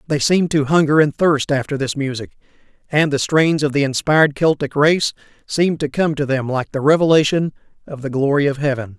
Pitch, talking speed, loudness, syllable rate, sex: 145 Hz, 200 wpm, -17 LUFS, 5.6 syllables/s, male